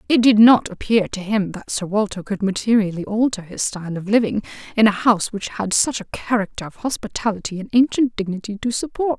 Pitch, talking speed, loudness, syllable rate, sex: 215 Hz, 200 wpm, -20 LUFS, 5.8 syllables/s, female